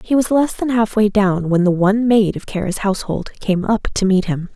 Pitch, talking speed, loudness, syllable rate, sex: 205 Hz, 235 wpm, -17 LUFS, 5.4 syllables/s, female